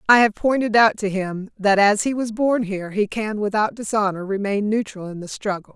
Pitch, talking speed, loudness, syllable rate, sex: 210 Hz, 220 wpm, -20 LUFS, 5.3 syllables/s, female